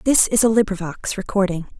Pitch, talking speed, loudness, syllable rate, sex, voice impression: 200 Hz, 165 wpm, -19 LUFS, 6.6 syllables/s, female, feminine, slightly young, slightly clear, intellectual, calm, slightly lively